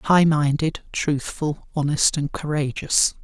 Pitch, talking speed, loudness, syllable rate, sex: 150 Hz, 110 wpm, -22 LUFS, 3.7 syllables/s, male